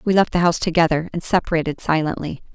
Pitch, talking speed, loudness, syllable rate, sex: 165 Hz, 190 wpm, -19 LUFS, 6.9 syllables/s, female